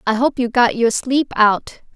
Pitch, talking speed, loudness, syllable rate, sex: 240 Hz, 215 wpm, -17 LUFS, 4.4 syllables/s, female